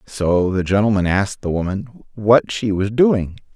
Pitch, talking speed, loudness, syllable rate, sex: 105 Hz, 170 wpm, -18 LUFS, 4.4 syllables/s, male